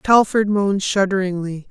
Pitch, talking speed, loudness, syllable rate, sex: 195 Hz, 105 wpm, -18 LUFS, 4.8 syllables/s, female